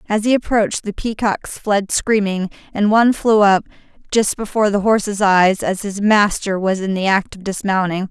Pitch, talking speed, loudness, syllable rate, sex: 200 Hz, 185 wpm, -17 LUFS, 5.0 syllables/s, female